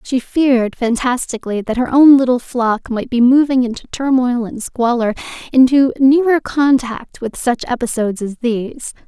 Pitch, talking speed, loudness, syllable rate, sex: 250 Hz, 150 wpm, -15 LUFS, 4.8 syllables/s, female